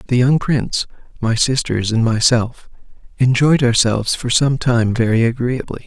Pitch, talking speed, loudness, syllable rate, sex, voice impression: 120 Hz, 145 wpm, -16 LUFS, 4.8 syllables/s, male, slightly masculine, adult-like, slightly thin, slightly weak, cool, refreshing, calm, slightly friendly, reassuring, kind, modest